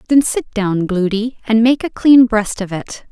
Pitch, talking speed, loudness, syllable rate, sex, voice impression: 225 Hz, 210 wpm, -15 LUFS, 4.3 syllables/s, female, feminine, adult-like, tensed, powerful, bright, clear, fluent, intellectual, calm, reassuring, elegant, lively